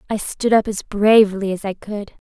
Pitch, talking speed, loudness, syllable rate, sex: 205 Hz, 205 wpm, -18 LUFS, 5.0 syllables/s, female